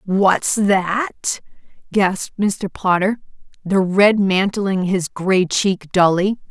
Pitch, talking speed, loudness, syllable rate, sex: 195 Hz, 110 wpm, -18 LUFS, 3.1 syllables/s, female